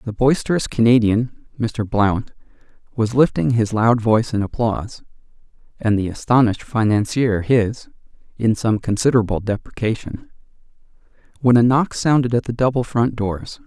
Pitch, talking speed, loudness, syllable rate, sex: 115 Hz, 130 wpm, -19 LUFS, 4.2 syllables/s, male